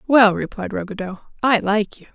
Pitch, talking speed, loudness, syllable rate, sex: 210 Hz, 170 wpm, -20 LUFS, 5.2 syllables/s, female